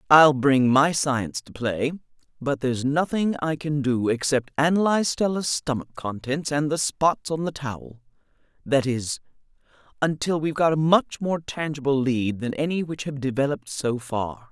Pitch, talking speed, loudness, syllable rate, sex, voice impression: 140 Hz, 165 wpm, -24 LUFS, 4.9 syllables/s, female, very feminine, middle-aged, thin, very tensed, powerful, bright, soft, clear, fluent, slightly cute, cool, very intellectual, refreshing, sincere, very calm, friendly, reassuring, unique, elegant, wild, slightly sweet, lively, strict, slightly intense